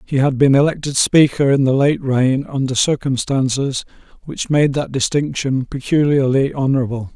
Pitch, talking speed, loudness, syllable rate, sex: 135 Hz, 140 wpm, -16 LUFS, 4.9 syllables/s, male